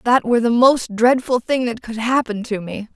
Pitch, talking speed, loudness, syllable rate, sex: 235 Hz, 225 wpm, -18 LUFS, 5.0 syllables/s, female